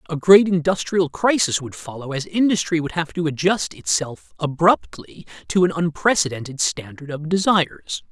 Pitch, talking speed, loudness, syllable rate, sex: 160 Hz, 150 wpm, -20 LUFS, 4.9 syllables/s, male